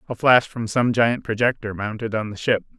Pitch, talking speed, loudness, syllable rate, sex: 115 Hz, 215 wpm, -21 LUFS, 5.3 syllables/s, male